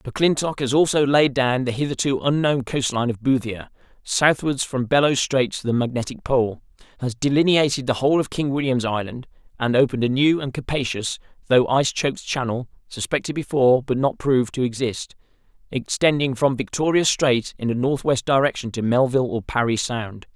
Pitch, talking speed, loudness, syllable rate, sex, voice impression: 130 Hz, 170 wpm, -21 LUFS, 5.4 syllables/s, male, masculine, adult-like, tensed, powerful, bright, clear, slightly nasal, intellectual, calm, friendly, unique, slightly wild, lively, slightly light